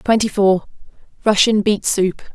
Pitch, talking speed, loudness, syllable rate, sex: 205 Hz, 100 wpm, -16 LUFS, 4.1 syllables/s, female